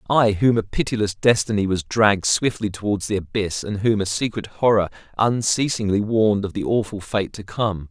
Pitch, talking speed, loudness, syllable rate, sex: 105 Hz, 180 wpm, -21 LUFS, 5.3 syllables/s, male